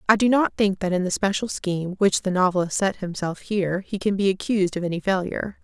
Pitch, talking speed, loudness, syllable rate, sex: 190 Hz, 235 wpm, -23 LUFS, 6.1 syllables/s, female